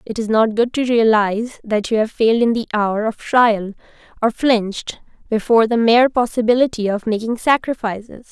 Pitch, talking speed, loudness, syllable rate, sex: 225 Hz, 175 wpm, -17 LUFS, 5.3 syllables/s, female